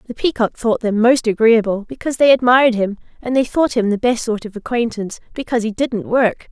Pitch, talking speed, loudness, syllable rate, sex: 230 Hz, 210 wpm, -17 LUFS, 5.9 syllables/s, female